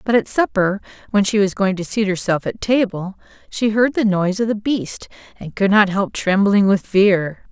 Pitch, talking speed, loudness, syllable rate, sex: 200 Hz, 210 wpm, -18 LUFS, 4.8 syllables/s, female